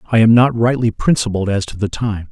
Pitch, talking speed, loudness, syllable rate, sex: 110 Hz, 235 wpm, -15 LUFS, 5.4 syllables/s, male